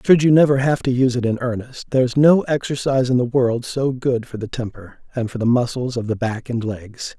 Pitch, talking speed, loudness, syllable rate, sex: 125 Hz, 240 wpm, -19 LUFS, 5.5 syllables/s, male